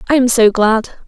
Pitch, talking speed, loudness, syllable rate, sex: 245 Hz, 225 wpm, -13 LUFS, 5.0 syllables/s, female